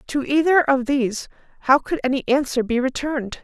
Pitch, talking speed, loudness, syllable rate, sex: 270 Hz, 175 wpm, -20 LUFS, 5.6 syllables/s, female